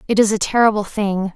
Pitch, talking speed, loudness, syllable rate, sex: 210 Hz, 220 wpm, -17 LUFS, 5.9 syllables/s, female